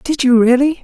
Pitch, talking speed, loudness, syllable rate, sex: 265 Hz, 215 wpm, -12 LUFS, 5.1 syllables/s, male